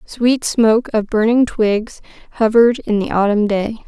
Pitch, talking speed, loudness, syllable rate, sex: 225 Hz, 155 wpm, -15 LUFS, 4.5 syllables/s, female